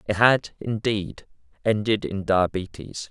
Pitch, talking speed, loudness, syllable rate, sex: 105 Hz, 115 wpm, -24 LUFS, 4.0 syllables/s, male